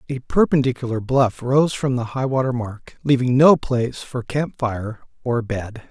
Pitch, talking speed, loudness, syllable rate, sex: 125 Hz, 165 wpm, -20 LUFS, 4.4 syllables/s, male